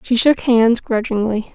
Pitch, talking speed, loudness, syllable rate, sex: 230 Hz, 155 wpm, -16 LUFS, 4.2 syllables/s, female